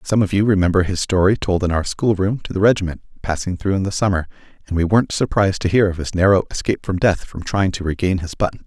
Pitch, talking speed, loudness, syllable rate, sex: 95 Hz, 250 wpm, -19 LUFS, 6.6 syllables/s, male